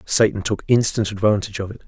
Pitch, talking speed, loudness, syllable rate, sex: 105 Hz, 190 wpm, -20 LUFS, 6.5 syllables/s, male